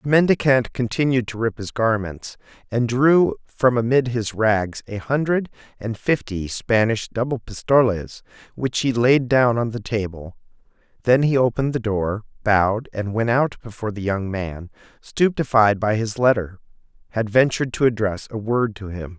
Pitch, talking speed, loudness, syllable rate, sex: 115 Hz, 165 wpm, -21 LUFS, 4.6 syllables/s, male